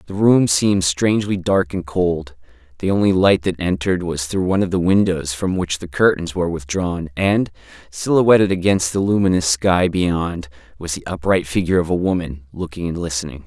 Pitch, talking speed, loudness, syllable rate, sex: 90 Hz, 185 wpm, -18 LUFS, 5.3 syllables/s, male